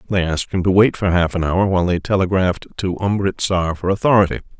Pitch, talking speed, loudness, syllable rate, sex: 95 Hz, 210 wpm, -18 LUFS, 6.3 syllables/s, male